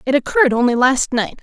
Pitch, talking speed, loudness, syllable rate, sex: 260 Hz, 210 wpm, -15 LUFS, 6.2 syllables/s, female